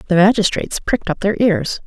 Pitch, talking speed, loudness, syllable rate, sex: 190 Hz, 195 wpm, -17 LUFS, 6.2 syllables/s, female